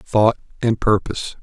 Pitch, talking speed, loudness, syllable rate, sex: 110 Hz, 125 wpm, -19 LUFS, 4.9 syllables/s, male